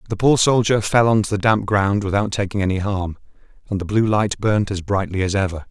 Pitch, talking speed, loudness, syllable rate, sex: 100 Hz, 230 wpm, -19 LUFS, 5.6 syllables/s, male